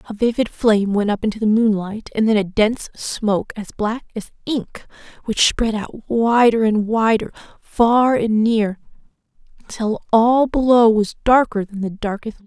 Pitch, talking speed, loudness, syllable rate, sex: 220 Hz, 170 wpm, -18 LUFS, 4.6 syllables/s, female